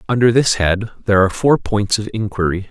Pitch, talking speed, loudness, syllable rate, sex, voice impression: 105 Hz, 200 wpm, -16 LUFS, 6.2 syllables/s, male, very masculine, very adult-like, slightly middle-aged, very thick, tensed, powerful, slightly bright, slightly hard, slightly clear, fluent, very cool, very intellectual, slightly refreshing, sincere, very calm, mature, friendly, very reassuring, unique, slightly elegant, wild, slightly sweet, kind, slightly modest